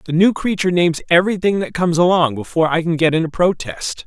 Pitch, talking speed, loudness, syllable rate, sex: 170 Hz, 220 wpm, -17 LUFS, 6.6 syllables/s, male